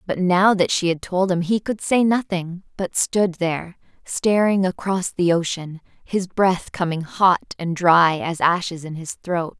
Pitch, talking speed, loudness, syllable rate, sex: 180 Hz, 180 wpm, -20 LUFS, 4.2 syllables/s, female